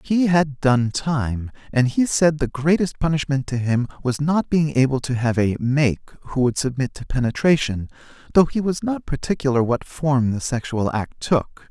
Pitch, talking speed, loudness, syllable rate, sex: 140 Hz, 185 wpm, -21 LUFS, 4.6 syllables/s, male